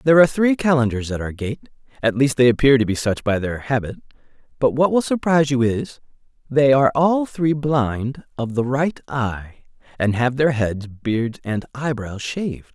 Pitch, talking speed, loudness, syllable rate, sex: 130 Hz, 195 wpm, -20 LUFS, 4.9 syllables/s, male